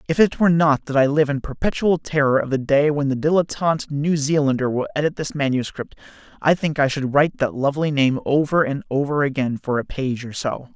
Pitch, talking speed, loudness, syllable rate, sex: 145 Hz, 220 wpm, -20 LUFS, 5.8 syllables/s, male